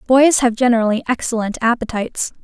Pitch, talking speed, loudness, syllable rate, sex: 235 Hz, 125 wpm, -17 LUFS, 6.2 syllables/s, female